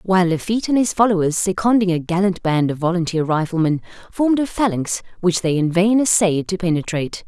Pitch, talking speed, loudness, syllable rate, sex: 185 Hz, 180 wpm, -18 LUFS, 5.9 syllables/s, female